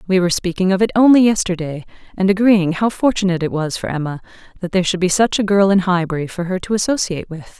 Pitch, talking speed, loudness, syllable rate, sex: 185 Hz, 230 wpm, -17 LUFS, 6.7 syllables/s, female